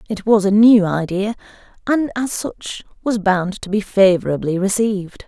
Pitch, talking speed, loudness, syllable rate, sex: 205 Hz, 160 wpm, -17 LUFS, 4.6 syllables/s, female